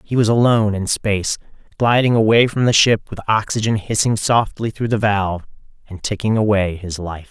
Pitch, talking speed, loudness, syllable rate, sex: 105 Hz, 180 wpm, -17 LUFS, 5.4 syllables/s, male